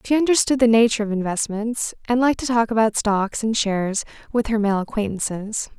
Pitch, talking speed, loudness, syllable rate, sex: 220 Hz, 185 wpm, -20 LUFS, 5.8 syllables/s, female